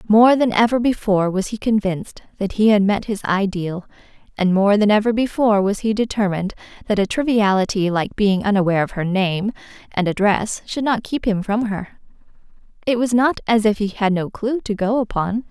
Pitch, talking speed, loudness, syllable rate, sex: 210 Hz, 195 wpm, -19 LUFS, 5.4 syllables/s, female